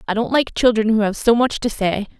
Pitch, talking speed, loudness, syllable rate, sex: 225 Hz, 275 wpm, -18 LUFS, 6.0 syllables/s, female